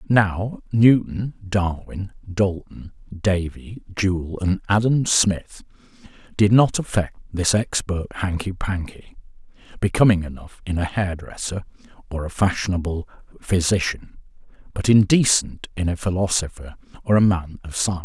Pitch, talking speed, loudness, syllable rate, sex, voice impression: 95 Hz, 115 wpm, -21 LUFS, 4.3 syllables/s, male, very masculine, very adult-like, old, very thick, tensed, very powerful, slightly bright, soft, muffled, fluent, raspy, very cool, very intellectual, very sincere, very calm, very mature, friendly, very reassuring, unique, elegant, very wild, sweet, lively, very kind, slightly intense, slightly modest